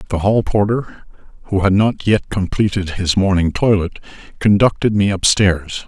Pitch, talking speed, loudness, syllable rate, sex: 100 Hz, 145 wpm, -16 LUFS, 4.6 syllables/s, male